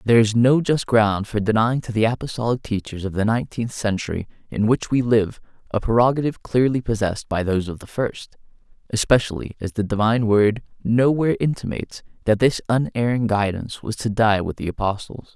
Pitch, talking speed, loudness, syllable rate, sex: 110 Hz, 175 wpm, -21 LUFS, 5.8 syllables/s, male